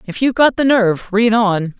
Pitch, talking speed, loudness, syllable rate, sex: 220 Hz, 235 wpm, -14 LUFS, 5.5 syllables/s, female